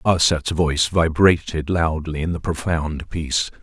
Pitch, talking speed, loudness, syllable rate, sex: 80 Hz, 130 wpm, -20 LUFS, 4.4 syllables/s, male